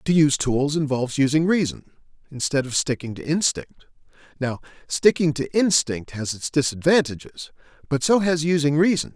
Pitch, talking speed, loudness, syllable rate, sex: 150 Hz, 150 wpm, -21 LUFS, 5.2 syllables/s, male